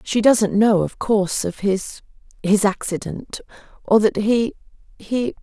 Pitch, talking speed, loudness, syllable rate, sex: 210 Hz, 110 wpm, -19 LUFS, 4.0 syllables/s, female